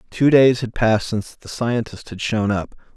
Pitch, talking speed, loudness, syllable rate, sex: 115 Hz, 205 wpm, -19 LUFS, 5.2 syllables/s, male